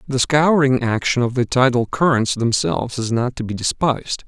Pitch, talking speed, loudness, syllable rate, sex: 125 Hz, 185 wpm, -18 LUFS, 5.1 syllables/s, male